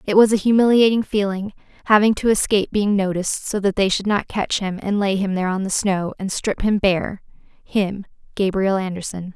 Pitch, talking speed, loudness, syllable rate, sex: 200 Hz, 190 wpm, -19 LUFS, 5.3 syllables/s, female